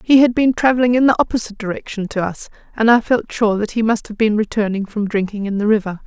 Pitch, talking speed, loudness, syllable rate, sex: 220 Hz, 245 wpm, -17 LUFS, 6.4 syllables/s, female